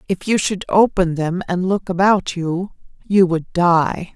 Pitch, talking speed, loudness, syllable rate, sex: 180 Hz, 175 wpm, -18 LUFS, 3.9 syllables/s, female